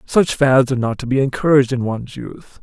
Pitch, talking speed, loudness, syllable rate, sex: 135 Hz, 230 wpm, -17 LUFS, 5.9 syllables/s, male